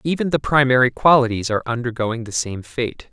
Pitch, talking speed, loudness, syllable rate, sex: 125 Hz, 175 wpm, -19 LUFS, 5.7 syllables/s, male